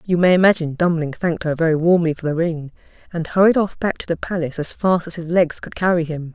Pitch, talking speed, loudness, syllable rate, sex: 170 Hz, 245 wpm, -19 LUFS, 6.4 syllables/s, female